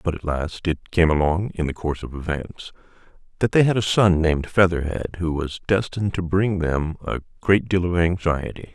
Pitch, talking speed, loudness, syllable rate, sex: 85 Hz, 200 wpm, -22 LUFS, 5.3 syllables/s, male